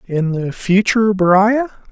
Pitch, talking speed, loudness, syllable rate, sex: 200 Hz, 125 wpm, -15 LUFS, 4.5 syllables/s, male